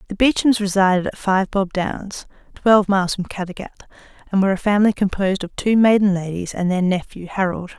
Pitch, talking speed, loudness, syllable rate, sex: 195 Hz, 185 wpm, -19 LUFS, 5.9 syllables/s, female